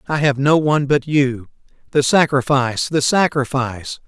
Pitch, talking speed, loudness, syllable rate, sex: 140 Hz, 145 wpm, -17 LUFS, 5.0 syllables/s, male